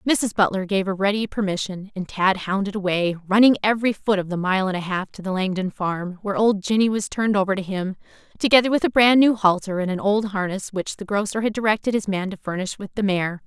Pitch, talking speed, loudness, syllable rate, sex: 200 Hz, 235 wpm, -21 LUFS, 6.0 syllables/s, female